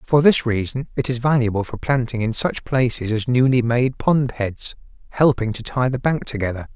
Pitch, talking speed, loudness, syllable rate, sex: 125 Hz, 195 wpm, -20 LUFS, 5.0 syllables/s, male